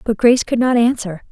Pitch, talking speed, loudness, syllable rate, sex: 230 Hz, 230 wpm, -15 LUFS, 5.9 syllables/s, female